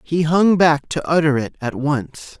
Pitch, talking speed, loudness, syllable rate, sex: 155 Hz, 200 wpm, -18 LUFS, 4.1 syllables/s, male